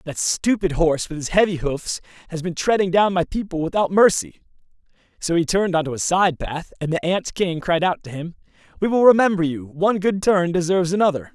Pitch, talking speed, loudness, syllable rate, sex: 175 Hz, 205 wpm, -20 LUFS, 5.7 syllables/s, male